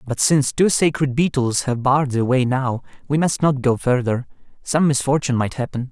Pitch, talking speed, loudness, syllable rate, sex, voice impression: 135 Hz, 195 wpm, -19 LUFS, 5.4 syllables/s, male, masculine, slightly adult-like, fluent, refreshing, friendly